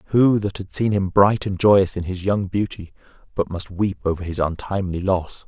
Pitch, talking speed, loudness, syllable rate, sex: 95 Hz, 210 wpm, -21 LUFS, 5.0 syllables/s, male